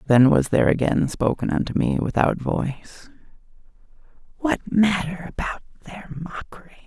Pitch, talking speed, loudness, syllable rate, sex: 160 Hz, 120 wpm, -22 LUFS, 5.3 syllables/s, male